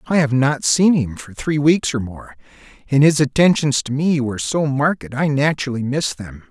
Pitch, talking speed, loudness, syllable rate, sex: 135 Hz, 205 wpm, -18 LUFS, 5.0 syllables/s, male